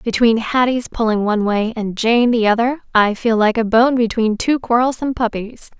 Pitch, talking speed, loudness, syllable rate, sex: 230 Hz, 185 wpm, -16 LUFS, 5.1 syllables/s, female